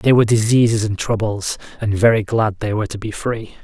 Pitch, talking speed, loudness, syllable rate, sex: 110 Hz, 215 wpm, -18 LUFS, 5.7 syllables/s, male